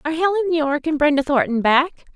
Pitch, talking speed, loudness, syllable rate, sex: 295 Hz, 195 wpm, -19 LUFS, 6.8 syllables/s, female